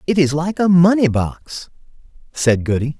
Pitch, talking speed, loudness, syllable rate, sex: 160 Hz, 160 wpm, -16 LUFS, 4.5 syllables/s, male